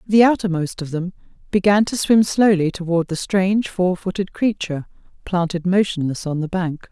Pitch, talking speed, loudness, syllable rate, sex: 185 Hz, 165 wpm, -19 LUFS, 5.1 syllables/s, female